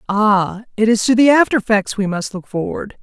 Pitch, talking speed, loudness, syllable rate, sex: 215 Hz, 220 wpm, -16 LUFS, 5.2 syllables/s, female